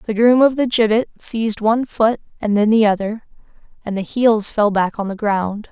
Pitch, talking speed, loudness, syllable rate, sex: 220 Hz, 210 wpm, -17 LUFS, 5.1 syllables/s, female